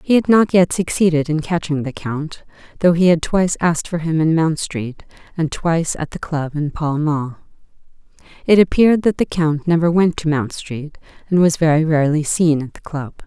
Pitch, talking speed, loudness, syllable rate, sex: 160 Hz, 205 wpm, -17 LUFS, 5.1 syllables/s, female